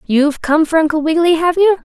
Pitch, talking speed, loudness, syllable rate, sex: 320 Hz, 220 wpm, -14 LUFS, 6.4 syllables/s, female